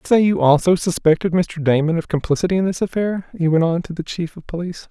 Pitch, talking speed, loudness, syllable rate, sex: 170 Hz, 245 wpm, -19 LUFS, 6.3 syllables/s, male